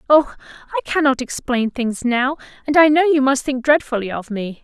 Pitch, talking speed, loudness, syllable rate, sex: 260 Hz, 195 wpm, -18 LUFS, 5.1 syllables/s, female